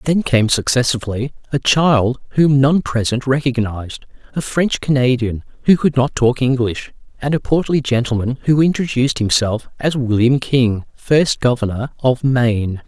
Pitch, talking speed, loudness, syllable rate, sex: 130 Hz, 145 wpm, -16 LUFS, 4.7 syllables/s, male